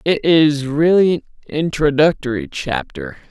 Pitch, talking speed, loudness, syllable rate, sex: 160 Hz, 110 wpm, -16 LUFS, 4.2 syllables/s, male